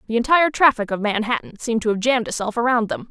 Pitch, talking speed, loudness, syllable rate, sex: 230 Hz, 230 wpm, -19 LUFS, 7.3 syllables/s, female